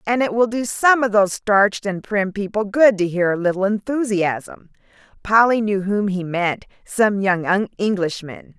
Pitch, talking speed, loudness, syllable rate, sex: 205 Hz, 170 wpm, -19 LUFS, 4.6 syllables/s, female